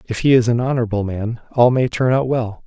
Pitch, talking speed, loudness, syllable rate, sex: 120 Hz, 245 wpm, -17 LUFS, 5.8 syllables/s, male